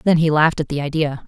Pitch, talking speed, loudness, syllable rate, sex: 155 Hz, 285 wpm, -18 LUFS, 7.0 syllables/s, female